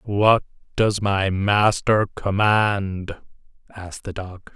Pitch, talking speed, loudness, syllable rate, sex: 100 Hz, 105 wpm, -20 LUFS, 3.0 syllables/s, male